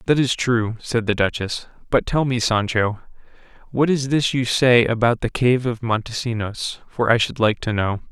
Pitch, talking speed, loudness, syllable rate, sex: 120 Hz, 190 wpm, -20 LUFS, 4.6 syllables/s, male